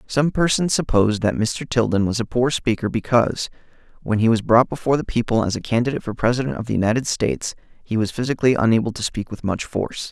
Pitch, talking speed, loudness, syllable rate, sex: 120 Hz, 215 wpm, -20 LUFS, 6.5 syllables/s, male